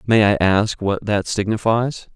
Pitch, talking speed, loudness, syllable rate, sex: 105 Hz, 165 wpm, -19 LUFS, 4.0 syllables/s, male